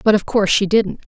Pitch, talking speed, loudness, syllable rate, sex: 200 Hz, 260 wpm, -16 LUFS, 6.2 syllables/s, female